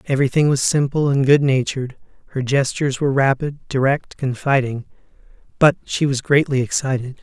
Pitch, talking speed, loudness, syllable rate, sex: 135 Hz, 135 wpm, -18 LUFS, 5.7 syllables/s, male